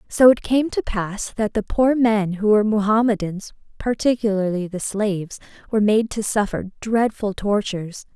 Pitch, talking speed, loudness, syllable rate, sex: 210 Hz, 155 wpm, -20 LUFS, 4.9 syllables/s, female